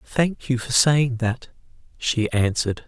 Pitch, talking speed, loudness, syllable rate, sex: 125 Hz, 145 wpm, -21 LUFS, 3.9 syllables/s, male